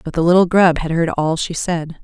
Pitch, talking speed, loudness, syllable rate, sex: 165 Hz, 265 wpm, -16 LUFS, 5.3 syllables/s, female